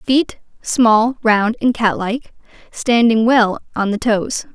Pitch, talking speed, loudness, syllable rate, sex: 230 Hz, 120 wpm, -16 LUFS, 3.6 syllables/s, female